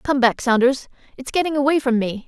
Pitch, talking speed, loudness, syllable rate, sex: 260 Hz, 210 wpm, -19 LUFS, 5.8 syllables/s, female